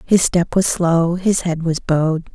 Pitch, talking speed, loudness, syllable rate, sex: 170 Hz, 205 wpm, -17 LUFS, 4.1 syllables/s, female